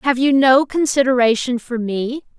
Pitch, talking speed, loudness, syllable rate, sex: 255 Hz, 150 wpm, -16 LUFS, 4.6 syllables/s, female